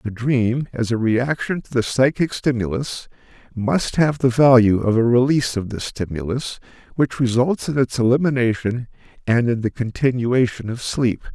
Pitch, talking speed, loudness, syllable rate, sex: 125 Hz, 160 wpm, -19 LUFS, 4.7 syllables/s, male